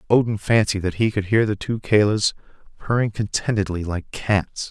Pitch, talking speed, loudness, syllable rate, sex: 105 Hz, 165 wpm, -21 LUFS, 4.9 syllables/s, male